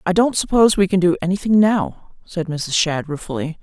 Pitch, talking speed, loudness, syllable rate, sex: 180 Hz, 200 wpm, -18 LUFS, 5.4 syllables/s, female